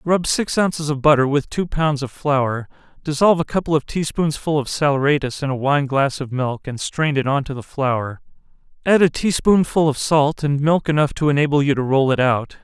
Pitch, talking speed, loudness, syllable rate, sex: 145 Hz, 215 wpm, -19 LUFS, 5.2 syllables/s, male